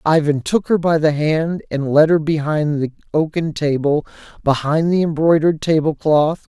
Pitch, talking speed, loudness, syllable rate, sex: 155 Hz, 155 wpm, -17 LUFS, 4.7 syllables/s, male